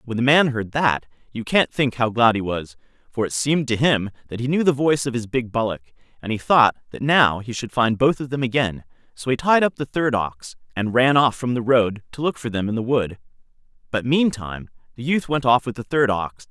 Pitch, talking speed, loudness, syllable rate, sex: 125 Hz, 245 wpm, -21 LUFS, 5.5 syllables/s, male